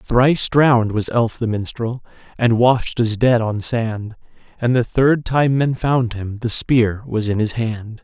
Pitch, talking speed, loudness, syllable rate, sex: 115 Hz, 185 wpm, -18 LUFS, 3.9 syllables/s, male